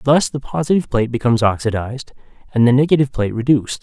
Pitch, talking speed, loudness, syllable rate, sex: 125 Hz, 170 wpm, -17 LUFS, 7.7 syllables/s, male